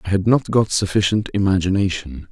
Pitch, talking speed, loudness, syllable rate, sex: 100 Hz, 155 wpm, -19 LUFS, 5.5 syllables/s, male